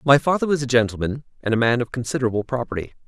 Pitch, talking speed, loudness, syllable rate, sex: 125 Hz, 215 wpm, -21 LUFS, 7.3 syllables/s, male